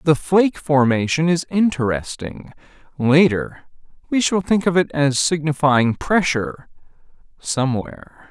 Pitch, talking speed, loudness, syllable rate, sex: 150 Hz, 100 wpm, -18 LUFS, 4.4 syllables/s, male